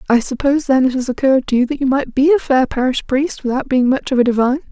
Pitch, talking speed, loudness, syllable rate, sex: 265 Hz, 280 wpm, -16 LUFS, 6.8 syllables/s, female